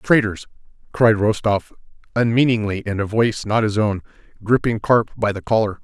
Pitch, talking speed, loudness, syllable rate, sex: 110 Hz, 155 wpm, -19 LUFS, 5.1 syllables/s, male